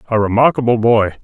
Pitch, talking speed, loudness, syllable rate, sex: 115 Hz, 145 wpm, -14 LUFS, 6.4 syllables/s, male